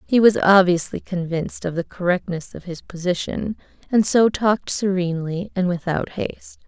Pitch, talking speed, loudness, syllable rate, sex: 185 Hz, 155 wpm, -21 LUFS, 5.1 syllables/s, female